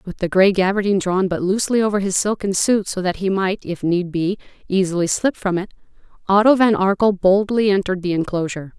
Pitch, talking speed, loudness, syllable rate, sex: 190 Hz, 200 wpm, -18 LUFS, 5.9 syllables/s, female